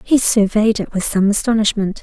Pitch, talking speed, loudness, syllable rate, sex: 210 Hz, 180 wpm, -16 LUFS, 5.2 syllables/s, female